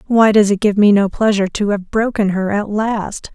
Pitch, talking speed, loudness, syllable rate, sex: 205 Hz, 235 wpm, -15 LUFS, 5.0 syllables/s, female